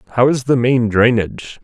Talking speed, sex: 185 wpm, male